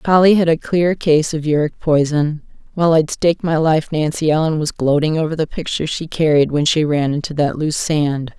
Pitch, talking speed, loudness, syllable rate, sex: 155 Hz, 205 wpm, -16 LUFS, 5.4 syllables/s, female